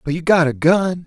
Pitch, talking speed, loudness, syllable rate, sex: 165 Hz, 280 wpm, -16 LUFS, 5.2 syllables/s, male